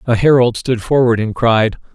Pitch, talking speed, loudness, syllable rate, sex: 120 Hz, 185 wpm, -14 LUFS, 4.9 syllables/s, male